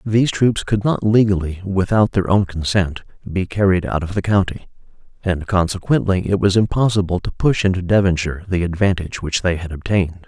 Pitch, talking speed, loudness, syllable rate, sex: 95 Hz, 175 wpm, -18 LUFS, 5.6 syllables/s, male